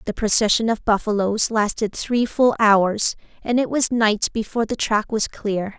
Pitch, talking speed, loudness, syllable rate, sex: 220 Hz, 175 wpm, -20 LUFS, 4.5 syllables/s, female